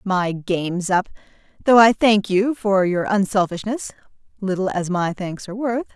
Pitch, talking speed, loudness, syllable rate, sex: 200 Hz, 150 wpm, -20 LUFS, 4.7 syllables/s, female